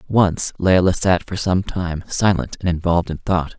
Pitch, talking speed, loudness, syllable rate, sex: 90 Hz, 185 wpm, -19 LUFS, 4.6 syllables/s, male